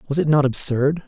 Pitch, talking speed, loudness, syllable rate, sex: 140 Hz, 225 wpm, -18 LUFS, 5.8 syllables/s, male